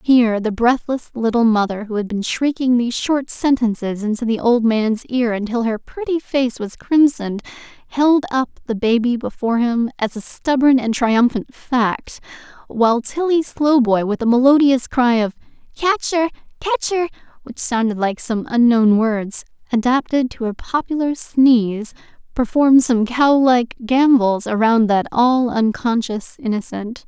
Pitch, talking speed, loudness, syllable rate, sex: 245 Hz, 140 wpm, -17 LUFS, 4.5 syllables/s, female